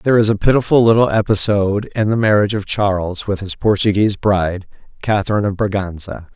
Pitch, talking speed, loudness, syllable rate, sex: 100 Hz, 170 wpm, -16 LUFS, 6.3 syllables/s, male